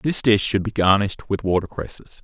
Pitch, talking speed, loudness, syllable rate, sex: 105 Hz, 215 wpm, -20 LUFS, 5.5 syllables/s, male